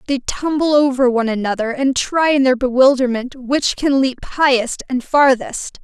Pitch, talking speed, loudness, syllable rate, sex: 260 Hz, 165 wpm, -16 LUFS, 4.7 syllables/s, female